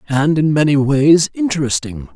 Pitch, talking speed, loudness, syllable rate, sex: 150 Hz, 140 wpm, -14 LUFS, 4.7 syllables/s, male